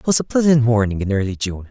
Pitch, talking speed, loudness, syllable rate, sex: 120 Hz, 280 wpm, -18 LUFS, 6.6 syllables/s, male